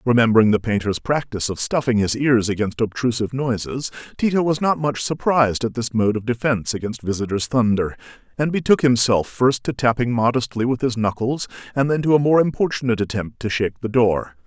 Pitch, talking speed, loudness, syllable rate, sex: 120 Hz, 185 wpm, -20 LUFS, 5.8 syllables/s, male